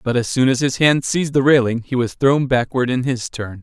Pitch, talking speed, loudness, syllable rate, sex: 130 Hz, 265 wpm, -17 LUFS, 5.4 syllables/s, male